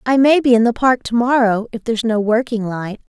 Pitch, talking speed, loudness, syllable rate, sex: 230 Hz, 265 wpm, -16 LUFS, 5.9 syllables/s, female